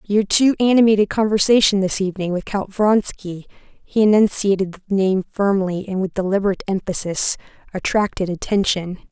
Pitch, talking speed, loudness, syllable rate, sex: 195 Hz, 130 wpm, -18 LUFS, 3.4 syllables/s, female